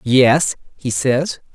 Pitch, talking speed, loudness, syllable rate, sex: 130 Hz, 115 wpm, -17 LUFS, 2.7 syllables/s, male